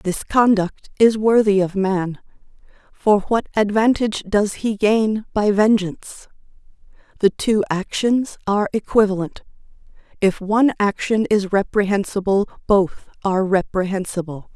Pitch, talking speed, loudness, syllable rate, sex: 205 Hz, 110 wpm, -19 LUFS, 4.4 syllables/s, female